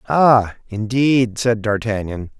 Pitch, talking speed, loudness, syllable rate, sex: 115 Hz, 100 wpm, -17 LUFS, 3.4 syllables/s, male